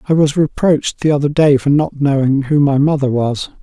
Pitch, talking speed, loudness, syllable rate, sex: 145 Hz, 215 wpm, -14 LUFS, 5.3 syllables/s, male